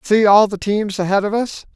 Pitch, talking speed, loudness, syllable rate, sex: 205 Hz, 240 wpm, -16 LUFS, 5.1 syllables/s, male